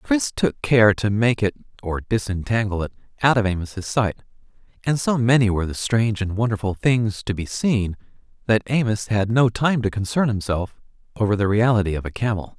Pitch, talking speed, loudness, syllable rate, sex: 110 Hz, 185 wpm, -21 LUFS, 5.3 syllables/s, male